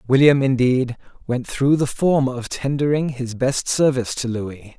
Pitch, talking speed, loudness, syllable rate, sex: 130 Hz, 165 wpm, -20 LUFS, 4.7 syllables/s, male